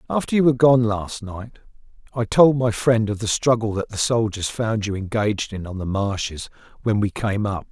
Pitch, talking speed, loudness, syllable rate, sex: 110 Hz, 210 wpm, -21 LUFS, 5.1 syllables/s, male